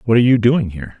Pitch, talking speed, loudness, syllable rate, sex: 115 Hz, 300 wpm, -14 LUFS, 7.4 syllables/s, male